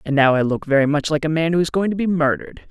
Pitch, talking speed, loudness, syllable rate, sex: 155 Hz, 330 wpm, -19 LUFS, 6.9 syllables/s, male